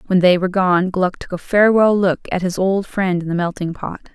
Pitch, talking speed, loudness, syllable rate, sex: 185 Hz, 245 wpm, -17 LUFS, 5.4 syllables/s, female